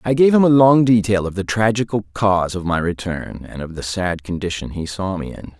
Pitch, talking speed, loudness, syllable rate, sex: 100 Hz, 235 wpm, -18 LUFS, 5.5 syllables/s, male